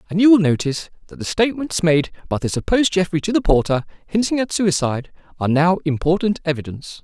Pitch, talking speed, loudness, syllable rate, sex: 175 Hz, 190 wpm, -19 LUFS, 6.6 syllables/s, male